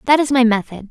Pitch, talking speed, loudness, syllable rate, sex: 245 Hz, 265 wpm, -15 LUFS, 6.5 syllables/s, female